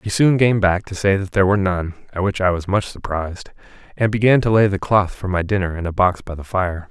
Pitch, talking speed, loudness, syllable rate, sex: 95 Hz, 270 wpm, -18 LUFS, 5.2 syllables/s, male